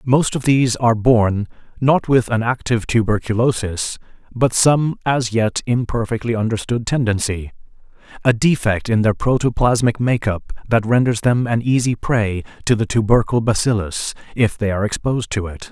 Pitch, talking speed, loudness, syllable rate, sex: 115 Hz, 150 wpm, -18 LUFS, 5.0 syllables/s, male